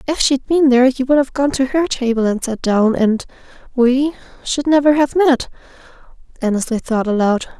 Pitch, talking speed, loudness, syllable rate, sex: 260 Hz, 175 wpm, -16 LUFS, 5.1 syllables/s, female